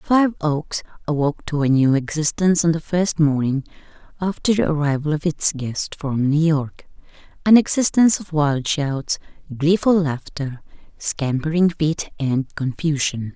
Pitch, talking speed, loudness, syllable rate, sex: 155 Hz, 135 wpm, -20 LUFS, 4.4 syllables/s, female